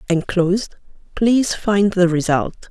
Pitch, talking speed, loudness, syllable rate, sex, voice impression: 190 Hz, 110 wpm, -18 LUFS, 4.2 syllables/s, female, very feminine, middle-aged, very thin, slightly tensed, powerful, slightly dark, slightly soft, clear, fluent, slightly raspy, slightly cool, intellectual, slightly refreshing, slightly sincere, calm, slightly friendly, reassuring, unique, elegant, slightly wild, sweet, lively, strict, slightly intense, slightly sharp, slightly light